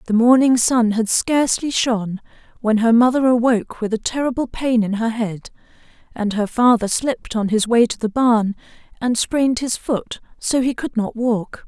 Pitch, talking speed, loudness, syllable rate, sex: 235 Hz, 185 wpm, -18 LUFS, 4.9 syllables/s, female